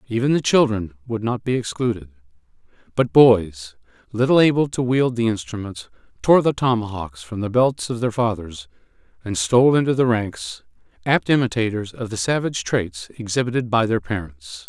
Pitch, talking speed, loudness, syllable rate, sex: 110 Hz, 160 wpm, -20 LUFS, 5.2 syllables/s, male